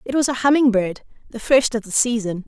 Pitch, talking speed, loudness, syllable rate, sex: 235 Hz, 220 wpm, -19 LUFS, 5.7 syllables/s, female